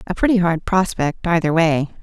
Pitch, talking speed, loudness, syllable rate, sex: 170 Hz, 175 wpm, -18 LUFS, 5.0 syllables/s, female